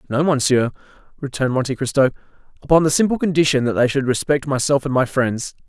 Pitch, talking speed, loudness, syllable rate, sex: 135 Hz, 180 wpm, -18 LUFS, 6.3 syllables/s, male